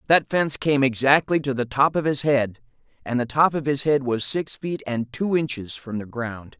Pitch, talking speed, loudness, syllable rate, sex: 135 Hz, 230 wpm, -22 LUFS, 4.8 syllables/s, male